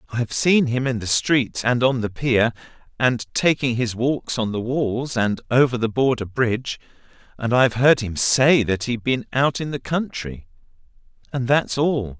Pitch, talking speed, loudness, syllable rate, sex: 125 Hz, 180 wpm, -20 LUFS, 4.5 syllables/s, male